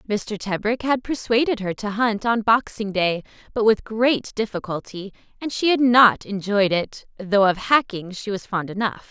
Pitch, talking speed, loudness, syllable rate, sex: 210 Hz, 180 wpm, -21 LUFS, 3.8 syllables/s, female